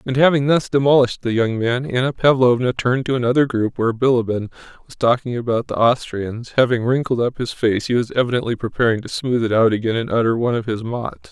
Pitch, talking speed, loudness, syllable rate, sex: 120 Hz, 210 wpm, -18 LUFS, 6.1 syllables/s, male